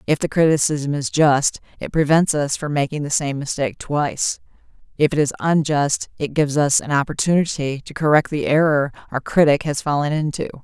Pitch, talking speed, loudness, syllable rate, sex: 145 Hz, 180 wpm, -19 LUFS, 5.4 syllables/s, female